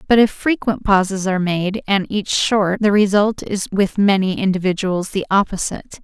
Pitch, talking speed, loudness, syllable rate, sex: 195 Hz, 170 wpm, -17 LUFS, 4.9 syllables/s, female